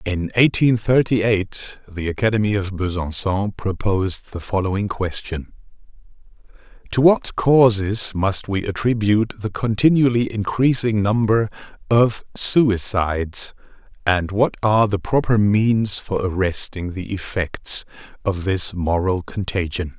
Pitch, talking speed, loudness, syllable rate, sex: 100 Hz, 115 wpm, -20 LUFS, 4.1 syllables/s, male